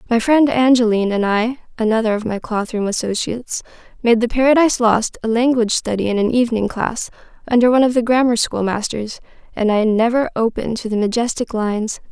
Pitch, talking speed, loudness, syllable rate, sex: 230 Hz, 185 wpm, -17 LUFS, 5.2 syllables/s, female